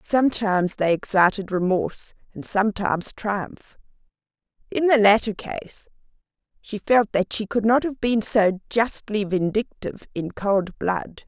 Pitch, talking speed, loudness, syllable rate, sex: 205 Hz, 135 wpm, -22 LUFS, 4.4 syllables/s, female